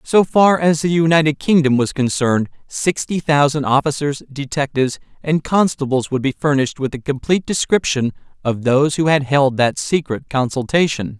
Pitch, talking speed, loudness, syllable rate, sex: 145 Hz, 155 wpm, -17 LUFS, 5.2 syllables/s, male